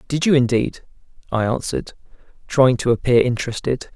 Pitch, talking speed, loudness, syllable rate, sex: 125 Hz, 135 wpm, -19 LUFS, 5.7 syllables/s, male